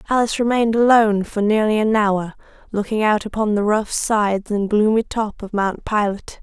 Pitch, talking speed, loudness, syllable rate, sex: 215 Hz, 175 wpm, -18 LUFS, 5.5 syllables/s, female